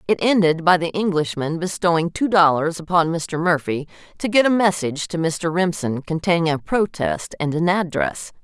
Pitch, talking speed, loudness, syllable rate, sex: 165 Hz, 170 wpm, -20 LUFS, 5.0 syllables/s, female